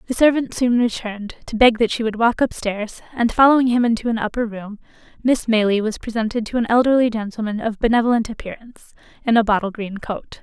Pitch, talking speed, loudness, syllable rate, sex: 225 Hz, 195 wpm, -19 LUFS, 6.0 syllables/s, female